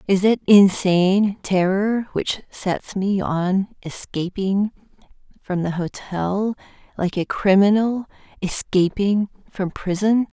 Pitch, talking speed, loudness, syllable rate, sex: 195 Hz, 105 wpm, -20 LUFS, 3.6 syllables/s, female